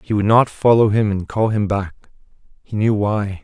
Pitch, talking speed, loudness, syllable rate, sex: 105 Hz, 210 wpm, -17 LUFS, 4.7 syllables/s, male